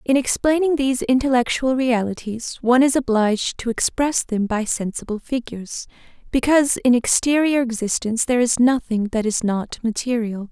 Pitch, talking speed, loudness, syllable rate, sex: 245 Hz, 145 wpm, -20 LUFS, 5.3 syllables/s, female